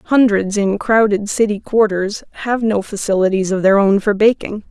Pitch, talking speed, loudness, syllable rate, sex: 205 Hz, 165 wpm, -16 LUFS, 4.7 syllables/s, female